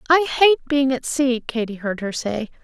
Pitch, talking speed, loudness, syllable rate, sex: 260 Hz, 205 wpm, -20 LUFS, 4.8 syllables/s, female